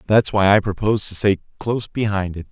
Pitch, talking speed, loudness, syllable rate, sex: 100 Hz, 240 wpm, -19 LUFS, 6.6 syllables/s, male